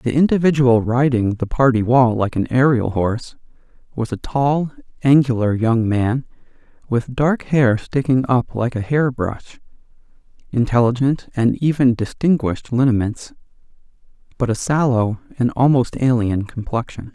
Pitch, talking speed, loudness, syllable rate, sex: 125 Hz, 130 wpm, -18 LUFS, 4.6 syllables/s, male